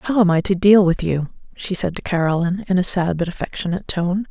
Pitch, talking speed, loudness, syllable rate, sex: 180 Hz, 235 wpm, -19 LUFS, 6.0 syllables/s, female